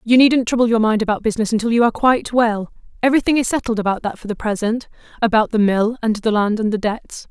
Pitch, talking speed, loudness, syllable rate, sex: 225 Hz, 230 wpm, -18 LUFS, 6.6 syllables/s, female